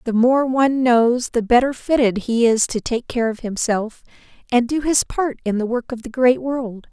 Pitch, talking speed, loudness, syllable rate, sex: 240 Hz, 215 wpm, -19 LUFS, 4.7 syllables/s, female